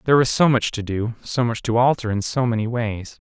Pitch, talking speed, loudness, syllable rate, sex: 115 Hz, 255 wpm, -21 LUFS, 5.7 syllables/s, male